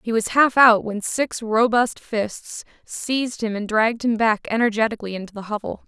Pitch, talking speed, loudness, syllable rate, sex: 225 Hz, 185 wpm, -20 LUFS, 5.1 syllables/s, female